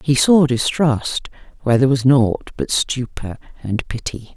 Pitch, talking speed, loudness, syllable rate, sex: 130 Hz, 150 wpm, -18 LUFS, 4.4 syllables/s, female